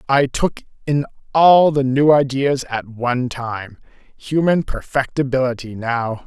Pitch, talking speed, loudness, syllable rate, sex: 130 Hz, 115 wpm, -18 LUFS, 3.9 syllables/s, male